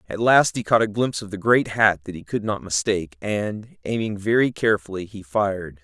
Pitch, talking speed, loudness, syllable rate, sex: 105 Hz, 215 wpm, -22 LUFS, 5.5 syllables/s, male